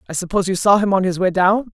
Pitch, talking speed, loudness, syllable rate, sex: 190 Hz, 310 wpm, -17 LUFS, 7.3 syllables/s, female